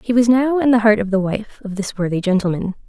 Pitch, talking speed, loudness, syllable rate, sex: 215 Hz, 270 wpm, -17 LUFS, 6.0 syllables/s, female